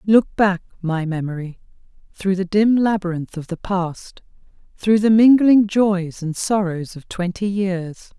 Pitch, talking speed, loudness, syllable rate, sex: 190 Hz, 145 wpm, -19 LUFS, 4.0 syllables/s, female